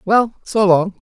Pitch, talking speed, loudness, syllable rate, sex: 200 Hz, 165 wpm, -16 LUFS, 3.8 syllables/s, male